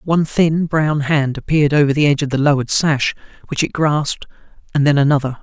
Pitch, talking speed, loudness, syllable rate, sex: 145 Hz, 190 wpm, -16 LUFS, 6.1 syllables/s, male